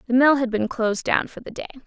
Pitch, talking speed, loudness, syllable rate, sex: 245 Hz, 290 wpm, -21 LUFS, 6.6 syllables/s, female